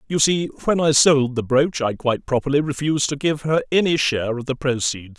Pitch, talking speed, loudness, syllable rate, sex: 140 Hz, 220 wpm, -20 LUFS, 5.8 syllables/s, male